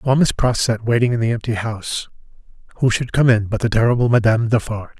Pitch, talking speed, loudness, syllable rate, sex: 115 Hz, 215 wpm, -18 LUFS, 6.6 syllables/s, male